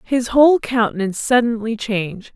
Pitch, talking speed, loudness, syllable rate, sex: 230 Hz, 125 wpm, -17 LUFS, 5.3 syllables/s, female